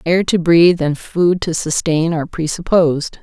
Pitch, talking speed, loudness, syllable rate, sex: 165 Hz, 165 wpm, -15 LUFS, 4.8 syllables/s, female